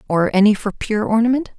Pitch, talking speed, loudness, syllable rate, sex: 220 Hz, 190 wpm, -17 LUFS, 5.7 syllables/s, female